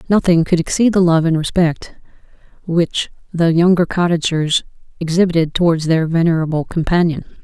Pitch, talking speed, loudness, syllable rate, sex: 170 Hz, 130 wpm, -16 LUFS, 5.3 syllables/s, female